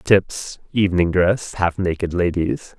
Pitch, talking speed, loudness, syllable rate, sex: 90 Hz, 110 wpm, -20 LUFS, 3.8 syllables/s, male